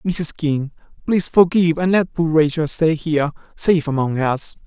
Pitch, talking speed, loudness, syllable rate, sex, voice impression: 160 Hz, 165 wpm, -18 LUFS, 5.1 syllables/s, male, masculine, adult-like, relaxed, slightly weak, slightly soft, raspy, intellectual, calm, reassuring, wild, slightly kind